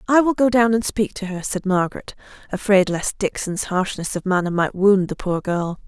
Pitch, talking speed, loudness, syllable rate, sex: 195 Hz, 215 wpm, -20 LUFS, 5.1 syllables/s, female